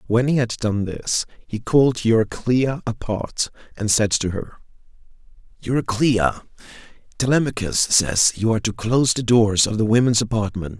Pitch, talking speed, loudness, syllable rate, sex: 110 Hz, 145 wpm, -20 LUFS, 4.9 syllables/s, male